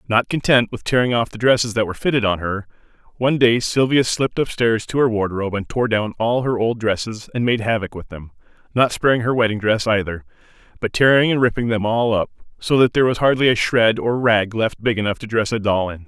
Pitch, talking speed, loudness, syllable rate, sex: 115 Hz, 230 wpm, -18 LUFS, 6.0 syllables/s, male